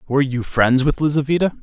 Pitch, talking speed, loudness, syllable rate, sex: 140 Hz, 185 wpm, -18 LUFS, 6.4 syllables/s, male